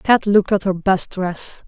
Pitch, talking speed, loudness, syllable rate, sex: 190 Hz, 215 wpm, -18 LUFS, 4.3 syllables/s, female